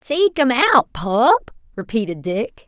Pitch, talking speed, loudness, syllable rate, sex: 245 Hz, 135 wpm, -18 LUFS, 3.7 syllables/s, female